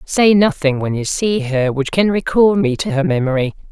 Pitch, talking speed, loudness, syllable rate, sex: 160 Hz, 210 wpm, -16 LUFS, 4.9 syllables/s, female